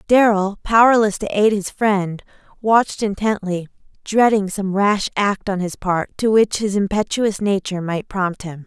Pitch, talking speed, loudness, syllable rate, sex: 200 Hz, 160 wpm, -18 LUFS, 4.4 syllables/s, female